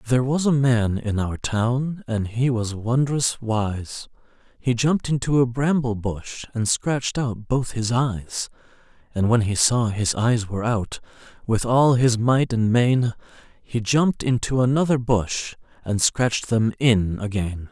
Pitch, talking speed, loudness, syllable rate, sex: 120 Hz, 165 wpm, -22 LUFS, 4.1 syllables/s, male